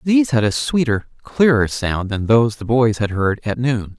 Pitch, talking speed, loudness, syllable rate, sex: 120 Hz, 210 wpm, -18 LUFS, 4.9 syllables/s, male